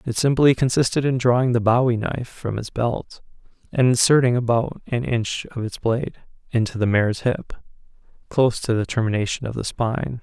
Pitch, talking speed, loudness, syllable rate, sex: 120 Hz, 175 wpm, -21 LUFS, 5.6 syllables/s, male